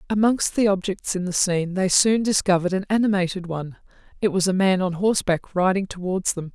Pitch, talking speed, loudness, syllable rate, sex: 190 Hz, 190 wpm, -22 LUFS, 5.9 syllables/s, female